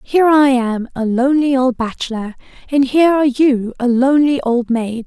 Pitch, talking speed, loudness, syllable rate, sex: 260 Hz, 180 wpm, -15 LUFS, 5.3 syllables/s, female